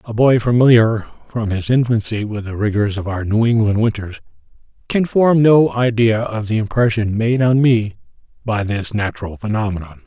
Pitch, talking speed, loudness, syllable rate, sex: 110 Hz, 165 wpm, -16 LUFS, 4.9 syllables/s, male